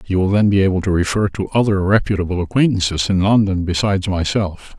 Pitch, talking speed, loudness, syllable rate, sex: 95 Hz, 190 wpm, -17 LUFS, 6.1 syllables/s, male